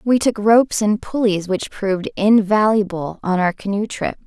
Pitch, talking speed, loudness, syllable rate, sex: 205 Hz, 170 wpm, -18 LUFS, 4.9 syllables/s, female